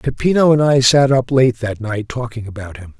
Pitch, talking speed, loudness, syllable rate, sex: 120 Hz, 220 wpm, -15 LUFS, 5.1 syllables/s, male